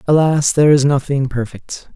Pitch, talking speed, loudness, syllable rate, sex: 140 Hz, 155 wpm, -15 LUFS, 5.1 syllables/s, male